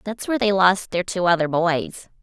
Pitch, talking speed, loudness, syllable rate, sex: 185 Hz, 215 wpm, -20 LUFS, 5.1 syllables/s, female